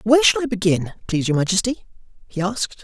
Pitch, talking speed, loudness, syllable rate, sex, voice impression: 210 Hz, 190 wpm, -20 LUFS, 6.9 syllables/s, male, masculine, slightly gender-neutral, slightly young, slightly adult-like, slightly thick, very tensed, powerful, very bright, hard, very clear, fluent, slightly cool, intellectual, very refreshing, very sincere, slightly calm, very friendly, very reassuring, unique, very wild, very lively, strict, very intense, slightly sharp, light